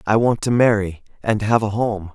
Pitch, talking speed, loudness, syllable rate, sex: 105 Hz, 225 wpm, -19 LUFS, 4.9 syllables/s, male